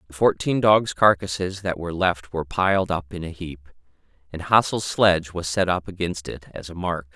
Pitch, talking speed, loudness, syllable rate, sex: 90 Hz, 200 wpm, -22 LUFS, 5.2 syllables/s, male